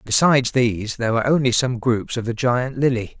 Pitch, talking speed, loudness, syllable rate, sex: 120 Hz, 205 wpm, -19 LUFS, 5.5 syllables/s, male